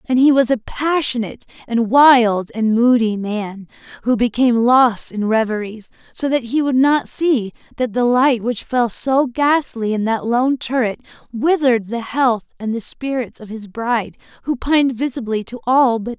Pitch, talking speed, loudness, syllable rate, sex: 240 Hz, 180 wpm, -17 LUFS, 4.6 syllables/s, female